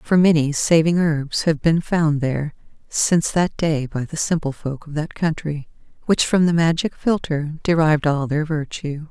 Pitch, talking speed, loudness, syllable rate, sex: 155 Hz, 180 wpm, -20 LUFS, 4.6 syllables/s, female